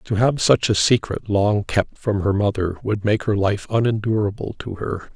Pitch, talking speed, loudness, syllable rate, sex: 105 Hz, 200 wpm, -20 LUFS, 4.7 syllables/s, male